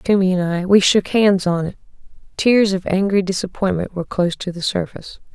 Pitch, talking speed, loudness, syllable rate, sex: 190 Hz, 180 wpm, -18 LUFS, 5.7 syllables/s, female